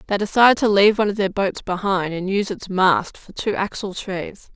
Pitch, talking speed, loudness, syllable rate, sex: 195 Hz, 225 wpm, -20 LUFS, 5.6 syllables/s, female